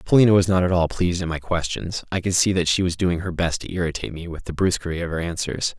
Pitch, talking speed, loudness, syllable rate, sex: 85 Hz, 280 wpm, -22 LUFS, 6.6 syllables/s, male